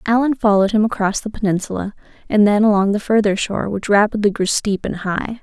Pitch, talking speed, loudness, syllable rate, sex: 210 Hz, 200 wpm, -17 LUFS, 6.0 syllables/s, female